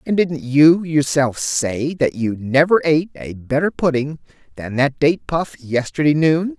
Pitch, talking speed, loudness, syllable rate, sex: 145 Hz, 165 wpm, -18 LUFS, 4.3 syllables/s, male